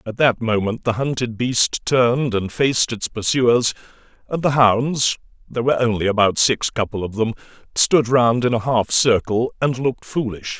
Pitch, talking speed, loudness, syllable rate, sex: 120 Hz, 175 wpm, -19 LUFS, 3.7 syllables/s, male